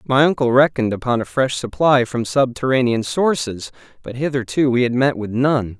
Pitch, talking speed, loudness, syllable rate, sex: 130 Hz, 175 wpm, -18 LUFS, 5.2 syllables/s, male